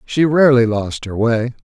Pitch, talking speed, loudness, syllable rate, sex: 125 Hz, 180 wpm, -15 LUFS, 4.8 syllables/s, male